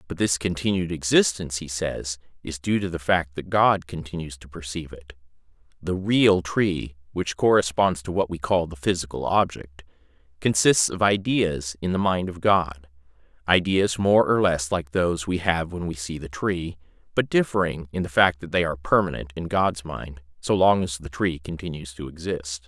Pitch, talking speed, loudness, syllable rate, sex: 85 Hz, 185 wpm, -23 LUFS, 4.9 syllables/s, male